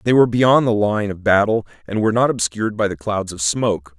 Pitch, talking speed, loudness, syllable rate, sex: 105 Hz, 240 wpm, -18 LUFS, 6.0 syllables/s, male